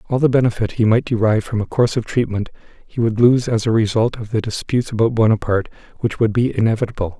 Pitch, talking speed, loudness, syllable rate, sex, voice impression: 115 Hz, 215 wpm, -18 LUFS, 6.8 syllables/s, male, very masculine, very adult-like, old, very thick, very relaxed, slightly weak, dark, very soft, muffled, slightly halting, slightly cool, intellectual, slightly sincere, very calm, mature, very friendly, very reassuring, slightly unique, slightly elegant, slightly wild, very kind, very modest